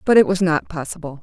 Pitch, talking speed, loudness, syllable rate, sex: 170 Hz, 245 wpm, -19 LUFS, 6.2 syllables/s, female